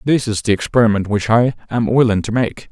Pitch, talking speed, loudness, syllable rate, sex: 115 Hz, 220 wpm, -16 LUFS, 5.7 syllables/s, male